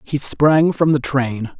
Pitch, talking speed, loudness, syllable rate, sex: 140 Hz, 190 wpm, -16 LUFS, 3.4 syllables/s, male